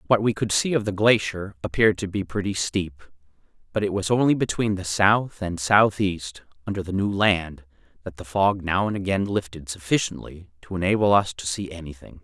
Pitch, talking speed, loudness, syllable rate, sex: 95 Hz, 190 wpm, -23 LUFS, 5.2 syllables/s, male